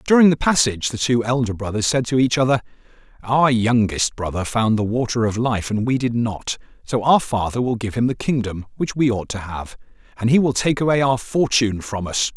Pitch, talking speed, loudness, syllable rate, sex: 120 Hz, 220 wpm, -20 LUFS, 5.5 syllables/s, male